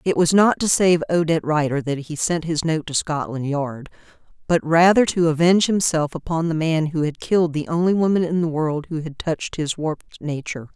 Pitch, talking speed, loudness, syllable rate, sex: 160 Hz, 210 wpm, -20 LUFS, 5.4 syllables/s, female